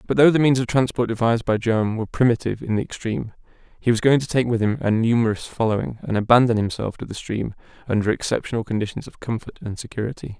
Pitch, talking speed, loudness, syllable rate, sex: 115 Hz, 215 wpm, -22 LUFS, 6.8 syllables/s, male